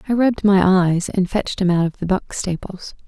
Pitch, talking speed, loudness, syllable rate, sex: 190 Hz, 235 wpm, -18 LUFS, 5.3 syllables/s, female